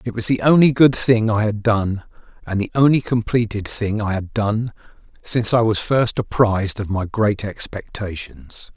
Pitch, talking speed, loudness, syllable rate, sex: 110 Hz, 180 wpm, -19 LUFS, 4.6 syllables/s, male